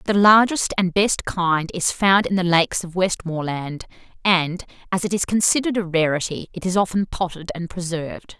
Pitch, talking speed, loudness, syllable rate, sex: 180 Hz, 180 wpm, -20 LUFS, 5.1 syllables/s, female